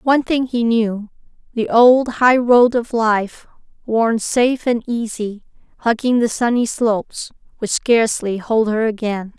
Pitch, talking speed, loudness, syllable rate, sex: 230 Hz, 140 wpm, -17 LUFS, 4.2 syllables/s, female